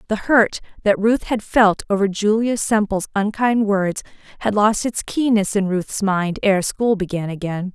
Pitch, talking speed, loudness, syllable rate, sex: 205 Hz, 170 wpm, -19 LUFS, 4.4 syllables/s, female